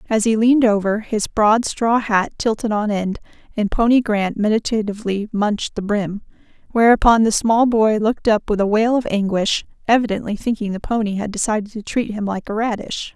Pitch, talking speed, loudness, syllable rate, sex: 215 Hz, 185 wpm, -18 LUFS, 5.4 syllables/s, female